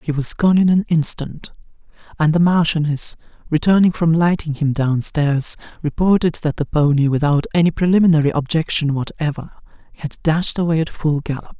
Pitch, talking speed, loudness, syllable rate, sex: 155 Hz, 155 wpm, -17 LUFS, 5.3 syllables/s, male